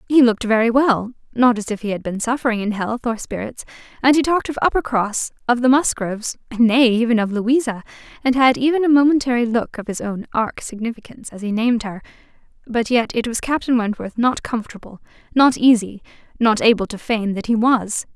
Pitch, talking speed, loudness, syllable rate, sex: 235 Hz, 195 wpm, -18 LUFS, 5.8 syllables/s, female